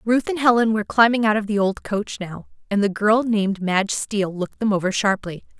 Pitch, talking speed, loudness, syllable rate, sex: 210 Hz, 225 wpm, -20 LUFS, 5.9 syllables/s, female